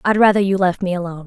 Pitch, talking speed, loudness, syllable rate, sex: 185 Hz, 285 wpm, -17 LUFS, 7.7 syllables/s, female